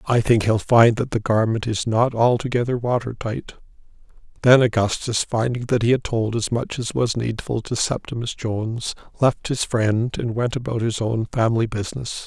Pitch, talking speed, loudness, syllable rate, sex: 115 Hz, 180 wpm, -21 LUFS, 4.9 syllables/s, male